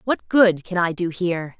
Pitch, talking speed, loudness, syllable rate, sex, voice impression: 180 Hz, 225 wpm, -20 LUFS, 4.8 syllables/s, female, very feminine, slightly young, thin, tensed, slightly powerful, very bright, slightly soft, very clear, very fluent, very cute, intellectual, very refreshing, sincere, slightly calm, very friendly, very unique, elegant, slightly wild, sweet, lively, kind, slightly intense, slightly light